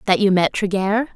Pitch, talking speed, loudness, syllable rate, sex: 200 Hz, 210 wpm, -18 LUFS, 5.2 syllables/s, female